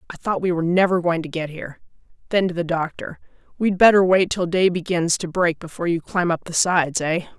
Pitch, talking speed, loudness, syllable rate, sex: 175 Hz, 225 wpm, -20 LUFS, 6.1 syllables/s, female